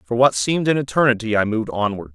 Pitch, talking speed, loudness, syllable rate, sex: 115 Hz, 225 wpm, -19 LUFS, 6.8 syllables/s, male